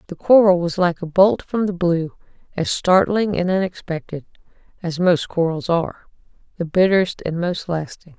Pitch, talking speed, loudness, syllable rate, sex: 175 Hz, 145 wpm, -19 LUFS, 5.0 syllables/s, female